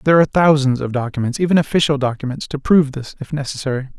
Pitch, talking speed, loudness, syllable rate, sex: 140 Hz, 195 wpm, -17 LUFS, 7.2 syllables/s, male